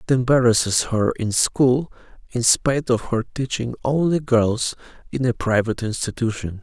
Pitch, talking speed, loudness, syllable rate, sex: 120 Hz, 145 wpm, -20 LUFS, 4.8 syllables/s, male